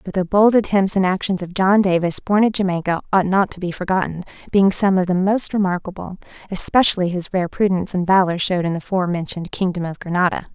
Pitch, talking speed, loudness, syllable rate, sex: 185 Hz, 210 wpm, -18 LUFS, 6.1 syllables/s, female